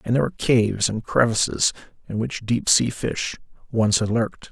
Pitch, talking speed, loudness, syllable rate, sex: 115 Hz, 185 wpm, -22 LUFS, 5.4 syllables/s, male